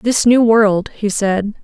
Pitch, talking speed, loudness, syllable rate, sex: 215 Hz, 185 wpm, -14 LUFS, 3.4 syllables/s, female